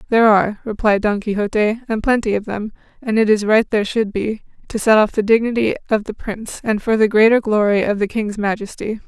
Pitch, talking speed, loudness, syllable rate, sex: 215 Hz, 220 wpm, -17 LUFS, 5.9 syllables/s, female